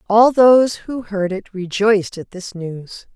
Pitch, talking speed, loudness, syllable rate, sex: 205 Hz, 170 wpm, -16 LUFS, 4.0 syllables/s, female